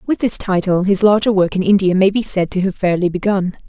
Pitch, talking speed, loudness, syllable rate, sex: 195 Hz, 245 wpm, -16 LUFS, 5.8 syllables/s, female